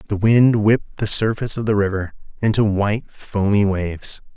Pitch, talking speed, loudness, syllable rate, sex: 105 Hz, 165 wpm, -19 LUFS, 5.3 syllables/s, male